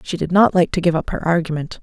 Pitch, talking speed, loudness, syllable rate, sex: 170 Hz, 295 wpm, -18 LUFS, 6.4 syllables/s, female